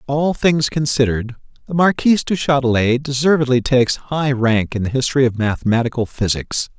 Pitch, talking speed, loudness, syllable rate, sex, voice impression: 130 Hz, 150 wpm, -17 LUFS, 5.6 syllables/s, male, masculine, adult-like, slightly fluent, cool, intellectual, slightly refreshing